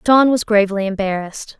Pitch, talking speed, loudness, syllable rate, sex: 210 Hz, 150 wpm, -16 LUFS, 6.1 syllables/s, female